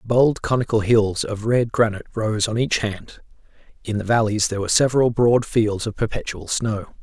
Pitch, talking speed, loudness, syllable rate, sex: 110 Hz, 180 wpm, -20 LUFS, 5.1 syllables/s, male